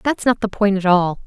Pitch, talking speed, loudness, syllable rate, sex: 200 Hz, 285 wpm, -17 LUFS, 5.2 syllables/s, female